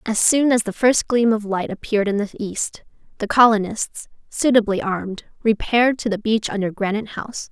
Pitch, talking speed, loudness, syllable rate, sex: 215 Hz, 185 wpm, -19 LUFS, 5.4 syllables/s, female